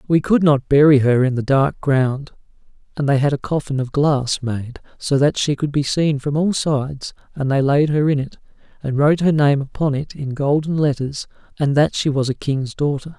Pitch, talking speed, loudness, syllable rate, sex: 140 Hz, 220 wpm, -18 LUFS, 5.0 syllables/s, male